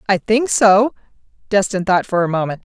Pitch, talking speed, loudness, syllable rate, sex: 200 Hz, 180 wpm, -16 LUFS, 5.2 syllables/s, female